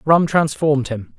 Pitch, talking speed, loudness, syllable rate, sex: 140 Hz, 150 wpm, -18 LUFS, 4.6 syllables/s, male